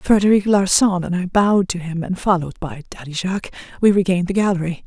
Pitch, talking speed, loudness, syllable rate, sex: 185 Hz, 195 wpm, -18 LUFS, 6.4 syllables/s, female